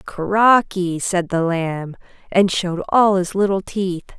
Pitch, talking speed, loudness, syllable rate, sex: 185 Hz, 145 wpm, -18 LUFS, 3.6 syllables/s, female